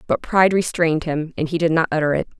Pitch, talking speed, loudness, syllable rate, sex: 160 Hz, 250 wpm, -19 LUFS, 6.9 syllables/s, female